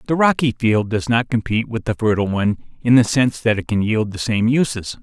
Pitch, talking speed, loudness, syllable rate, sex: 115 Hz, 240 wpm, -18 LUFS, 6.1 syllables/s, male